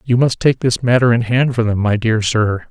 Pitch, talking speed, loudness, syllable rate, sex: 115 Hz, 265 wpm, -15 LUFS, 5.0 syllables/s, male